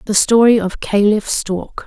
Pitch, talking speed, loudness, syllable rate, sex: 210 Hz, 160 wpm, -15 LUFS, 4.1 syllables/s, female